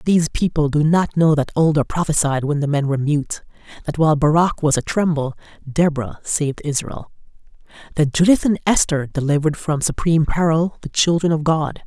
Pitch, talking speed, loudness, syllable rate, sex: 155 Hz, 165 wpm, -18 LUFS, 5.7 syllables/s, female